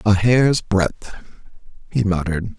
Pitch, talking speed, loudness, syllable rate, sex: 105 Hz, 115 wpm, -19 LUFS, 3.9 syllables/s, male